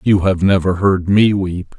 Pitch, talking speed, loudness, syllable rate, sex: 95 Hz, 200 wpm, -15 LUFS, 4.2 syllables/s, male